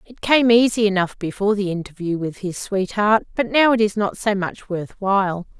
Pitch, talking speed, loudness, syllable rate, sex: 205 Hz, 205 wpm, -19 LUFS, 5.1 syllables/s, female